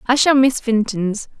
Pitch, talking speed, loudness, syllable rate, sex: 235 Hz, 170 wpm, -17 LUFS, 4.2 syllables/s, female